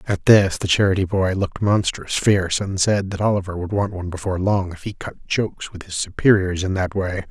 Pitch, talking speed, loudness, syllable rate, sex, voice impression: 95 Hz, 220 wpm, -20 LUFS, 5.7 syllables/s, male, masculine, middle-aged, powerful, hard, slightly muffled, raspy, sincere, mature, wild, lively, strict, sharp